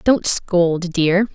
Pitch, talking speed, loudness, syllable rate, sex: 185 Hz, 135 wpm, -17 LUFS, 2.5 syllables/s, female